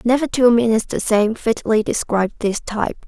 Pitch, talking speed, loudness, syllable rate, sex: 225 Hz, 175 wpm, -18 LUFS, 5.7 syllables/s, female